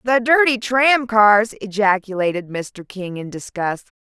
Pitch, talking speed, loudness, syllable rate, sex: 215 Hz, 135 wpm, -17 LUFS, 4.1 syllables/s, female